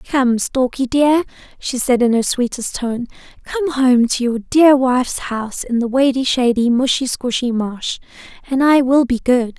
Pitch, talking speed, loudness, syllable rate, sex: 255 Hz, 175 wpm, -16 LUFS, 4.4 syllables/s, female